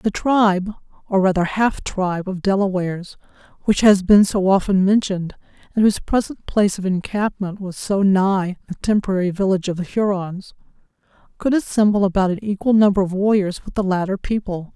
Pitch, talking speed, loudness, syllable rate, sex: 195 Hz, 165 wpm, -19 LUFS, 5.5 syllables/s, female